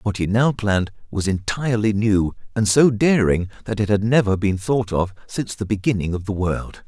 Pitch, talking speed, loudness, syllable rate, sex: 105 Hz, 200 wpm, -20 LUFS, 5.3 syllables/s, male